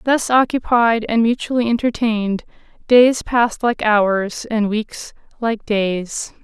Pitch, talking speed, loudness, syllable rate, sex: 225 Hz, 120 wpm, -17 LUFS, 3.8 syllables/s, female